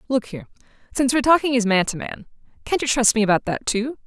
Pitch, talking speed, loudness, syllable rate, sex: 240 Hz, 235 wpm, -20 LUFS, 7.0 syllables/s, female